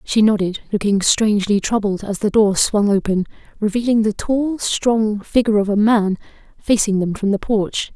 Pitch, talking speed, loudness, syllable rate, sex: 210 Hz, 175 wpm, -17 LUFS, 4.9 syllables/s, female